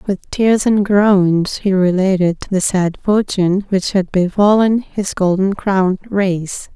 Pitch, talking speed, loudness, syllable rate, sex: 195 Hz, 140 wpm, -15 LUFS, 3.8 syllables/s, female